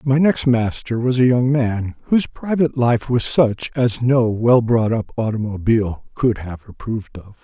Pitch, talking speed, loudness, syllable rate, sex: 120 Hz, 175 wpm, -18 LUFS, 4.6 syllables/s, male